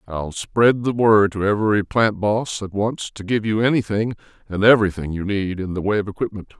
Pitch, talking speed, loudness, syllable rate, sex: 105 Hz, 210 wpm, -20 LUFS, 5.3 syllables/s, male